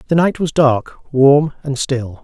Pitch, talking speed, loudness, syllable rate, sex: 140 Hz, 190 wpm, -15 LUFS, 3.6 syllables/s, male